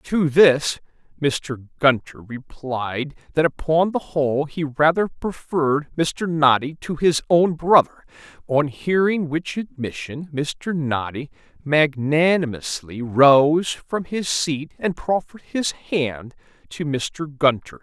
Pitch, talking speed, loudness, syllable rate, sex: 150 Hz, 120 wpm, -21 LUFS, 3.5 syllables/s, male